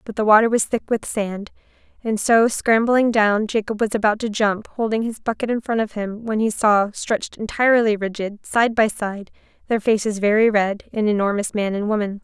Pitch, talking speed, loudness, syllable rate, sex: 215 Hz, 200 wpm, -20 LUFS, 5.1 syllables/s, female